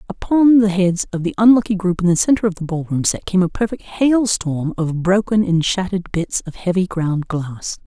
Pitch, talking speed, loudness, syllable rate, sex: 185 Hz, 205 wpm, -17 LUFS, 5.1 syllables/s, female